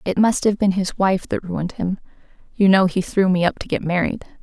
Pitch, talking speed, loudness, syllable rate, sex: 190 Hz, 245 wpm, -19 LUFS, 5.5 syllables/s, female